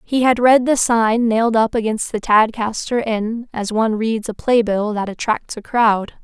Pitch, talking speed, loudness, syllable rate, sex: 225 Hz, 200 wpm, -17 LUFS, 4.5 syllables/s, female